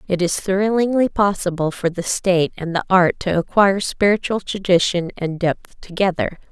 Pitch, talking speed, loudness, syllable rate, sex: 185 Hz, 155 wpm, -19 LUFS, 4.9 syllables/s, female